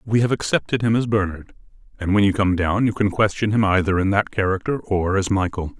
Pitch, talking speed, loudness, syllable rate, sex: 100 Hz, 230 wpm, -20 LUFS, 5.8 syllables/s, male